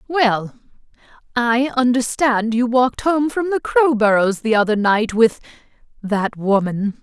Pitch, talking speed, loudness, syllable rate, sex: 235 Hz, 120 wpm, -17 LUFS, 4.1 syllables/s, female